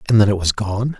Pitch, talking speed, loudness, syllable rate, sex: 105 Hz, 300 wpm, -18 LUFS, 6.2 syllables/s, male